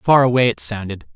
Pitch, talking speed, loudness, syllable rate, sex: 110 Hz, 210 wpm, -17 LUFS, 5.7 syllables/s, male